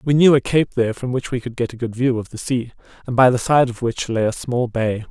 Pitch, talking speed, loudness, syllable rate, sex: 120 Hz, 305 wpm, -19 LUFS, 5.8 syllables/s, male